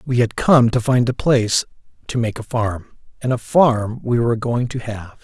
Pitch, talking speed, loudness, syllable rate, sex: 120 Hz, 220 wpm, -18 LUFS, 4.8 syllables/s, male